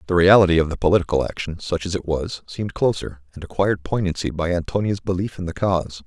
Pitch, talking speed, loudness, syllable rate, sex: 90 Hz, 210 wpm, -21 LUFS, 6.5 syllables/s, male